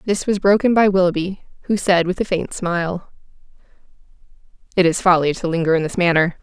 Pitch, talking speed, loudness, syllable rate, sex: 180 Hz, 175 wpm, -18 LUFS, 5.8 syllables/s, female